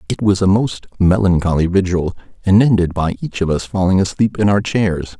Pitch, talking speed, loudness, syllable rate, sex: 95 Hz, 195 wpm, -16 LUFS, 5.2 syllables/s, male